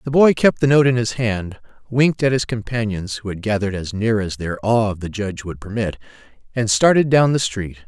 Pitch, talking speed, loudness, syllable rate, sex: 115 Hz, 230 wpm, -19 LUFS, 5.6 syllables/s, male